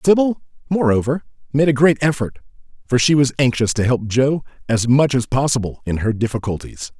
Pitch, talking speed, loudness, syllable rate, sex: 130 Hz, 170 wpm, -18 LUFS, 5.4 syllables/s, male